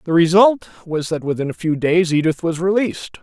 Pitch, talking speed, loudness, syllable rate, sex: 170 Hz, 205 wpm, -17 LUFS, 5.5 syllables/s, male